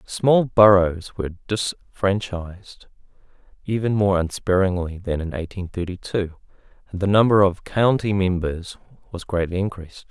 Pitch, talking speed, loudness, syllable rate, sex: 95 Hz, 125 wpm, -21 LUFS, 4.5 syllables/s, male